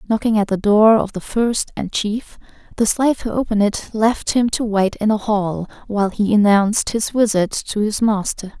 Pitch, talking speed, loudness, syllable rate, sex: 210 Hz, 200 wpm, -18 LUFS, 4.9 syllables/s, female